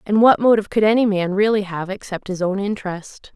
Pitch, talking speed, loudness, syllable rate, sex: 200 Hz, 215 wpm, -18 LUFS, 5.9 syllables/s, female